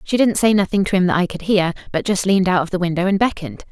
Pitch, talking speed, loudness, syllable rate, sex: 190 Hz, 305 wpm, -18 LUFS, 7.1 syllables/s, female